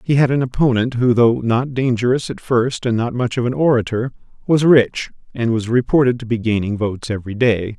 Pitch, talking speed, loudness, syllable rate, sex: 120 Hz, 210 wpm, -17 LUFS, 5.5 syllables/s, male